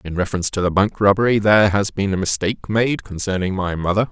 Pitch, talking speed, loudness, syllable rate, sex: 100 Hz, 220 wpm, -18 LUFS, 6.4 syllables/s, male